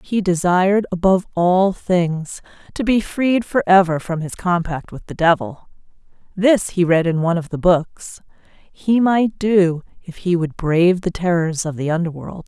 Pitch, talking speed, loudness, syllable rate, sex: 180 Hz, 170 wpm, -18 LUFS, 4.5 syllables/s, female